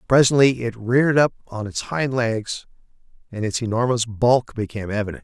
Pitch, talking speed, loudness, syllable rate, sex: 120 Hz, 160 wpm, -21 LUFS, 5.3 syllables/s, male